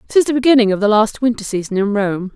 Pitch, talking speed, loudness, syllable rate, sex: 220 Hz, 255 wpm, -15 LUFS, 7.0 syllables/s, female